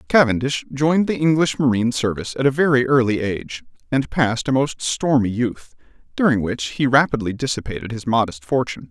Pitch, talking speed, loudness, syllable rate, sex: 125 Hz, 170 wpm, -19 LUFS, 5.9 syllables/s, male